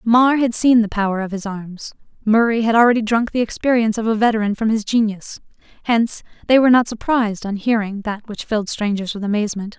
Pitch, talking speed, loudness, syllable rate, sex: 220 Hz, 200 wpm, -18 LUFS, 6.1 syllables/s, female